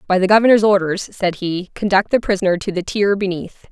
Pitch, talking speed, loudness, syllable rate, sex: 195 Hz, 210 wpm, -17 LUFS, 5.7 syllables/s, female